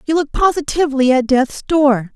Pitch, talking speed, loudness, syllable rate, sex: 280 Hz, 165 wpm, -15 LUFS, 5.0 syllables/s, female